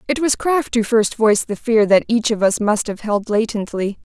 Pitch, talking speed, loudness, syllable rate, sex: 220 Hz, 230 wpm, -18 LUFS, 5.0 syllables/s, female